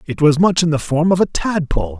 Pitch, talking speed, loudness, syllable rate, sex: 160 Hz, 270 wpm, -16 LUFS, 5.9 syllables/s, male